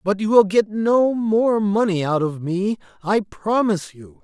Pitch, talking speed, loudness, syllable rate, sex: 200 Hz, 185 wpm, -19 LUFS, 4.1 syllables/s, male